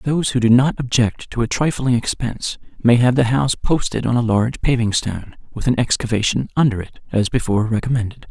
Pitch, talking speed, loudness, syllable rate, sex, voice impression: 120 Hz, 195 wpm, -18 LUFS, 6.0 syllables/s, male, masculine, adult-like, relaxed, weak, slightly dark, slightly muffled, intellectual, slightly refreshing, calm, slightly friendly, kind, modest